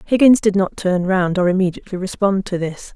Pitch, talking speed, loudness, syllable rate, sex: 190 Hz, 205 wpm, -17 LUFS, 5.6 syllables/s, female